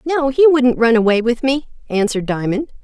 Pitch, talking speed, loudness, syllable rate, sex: 250 Hz, 190 wpm, -16 LUFS, 5.4 syllables/s, female